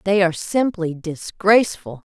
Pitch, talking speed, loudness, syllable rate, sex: 185 Hz, 115 wpm, -19 LUFS, 4.7 syllables/s, female